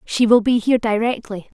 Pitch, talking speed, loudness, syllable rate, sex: 225 Hz, 190 wpm, -17 LUFS, 5.7 syllables/s, female